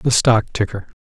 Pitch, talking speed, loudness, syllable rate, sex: 115 Hz, 175 wpm, -18 LUFS, 4.4 syllables/s, male